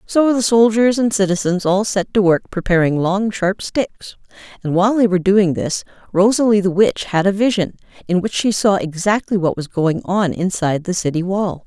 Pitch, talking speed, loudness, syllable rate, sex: 195 Hz, 195 wpm, -17 LUFS, 5.1 syllables/s, female